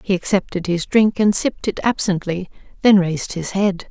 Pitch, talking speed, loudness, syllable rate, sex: 190 Hz, 185 wpm, -18 LUFS, 5.2 syllables/s, female